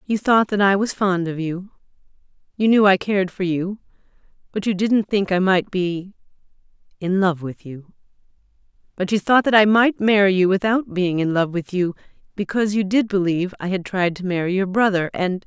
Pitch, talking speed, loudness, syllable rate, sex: 190 Hz, 190 wpm, -19 LUFS, 5.2 syllables/s, female